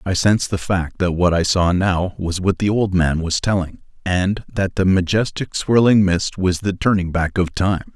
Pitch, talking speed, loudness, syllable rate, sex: 95 Hz, 210 wpm, -18 LUFS, 4.5 syllables/s, male